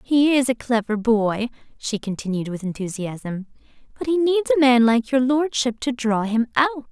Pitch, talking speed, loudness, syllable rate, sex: 240 Hz, 180 wpm, -21 LUFS, 4.7 syllables/s, female